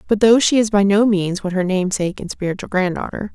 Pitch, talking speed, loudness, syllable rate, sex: 200 Hz, 250 wpm, -17 LUFS, 6.3 syllables/s, female